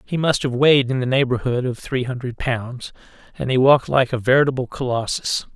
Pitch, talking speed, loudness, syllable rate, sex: 130 Hz, 195 wpm, -19 LUFS, 5.6 syllables/s, male